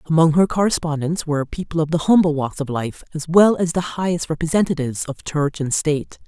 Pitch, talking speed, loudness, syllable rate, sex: 160 Hz, 200 wpm, -19 LUFS, 6.0 syllables/s, female